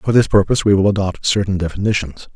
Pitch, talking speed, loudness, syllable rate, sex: 95 Hz, 205 wpm, -16 LUFS, 6.6 syllables/s, male